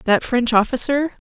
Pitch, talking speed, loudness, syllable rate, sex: 250 Hz, 140 wpm, -18 LUFS, 4.4 syllables/s, female